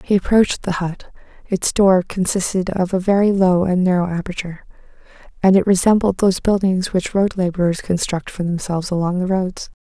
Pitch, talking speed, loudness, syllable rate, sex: 185 Hz, 170 wpm, -18 LUFS, 5.5 syllables/s, female